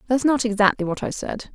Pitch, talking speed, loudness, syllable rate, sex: 230 Hz, 235 wpm, -22 LUFS, 5.9 syllables/s, female